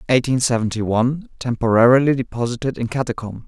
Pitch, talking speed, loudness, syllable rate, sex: 125 Hz, 105 wpm, -19 LUFS, 6.1 syllables/s, male